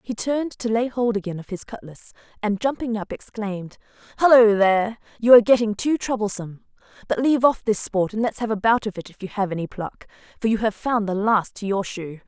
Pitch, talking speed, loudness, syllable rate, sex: 215 Hz, 225 wpm, -21 LUFS, 5.9 syllables/s, female